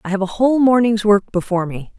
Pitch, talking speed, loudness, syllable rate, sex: 210 Hz, 240 wpm, -16 LUFS, 6.7 syllables/s, female